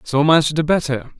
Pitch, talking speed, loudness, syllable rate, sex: 150 Hz, 200 wpm, -17 LUFS, 4.8 syllables/s, male